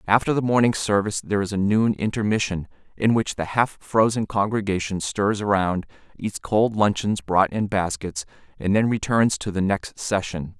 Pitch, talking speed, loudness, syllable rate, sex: 100 Hz, 170 wpm, -22 LUFS, 5.0 syllables/s, male